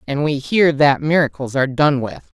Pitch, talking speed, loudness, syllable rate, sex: 145 Hz, 200 wpm, -17 LUFS, 5.1 syllables/s, female